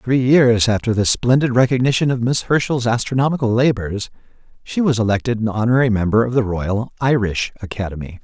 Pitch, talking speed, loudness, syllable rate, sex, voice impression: 120 Hz, 160 wpm, -17 LUFS, 5.8 syllables/s, male, very masculine, middle-aged, thick, tensed, slightly powerful, bright, soft, clear, fluent, slightly raspy, very cool, very intellectual, slightly refreshing, sincere, very calm, very mature, very friendly, very reassuring, very unique, elegant, slightly wild, sweet, lively, kind, slightly modest, slightly light